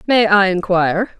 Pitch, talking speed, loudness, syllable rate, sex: 195 Hz, 150 wpm, -14 LUFS, 5.1 syllables/s, female